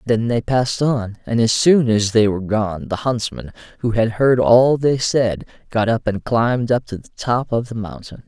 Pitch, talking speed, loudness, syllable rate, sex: 115 Hz, 220 wpm, -18 LUFS, 4.7 syllables/s, male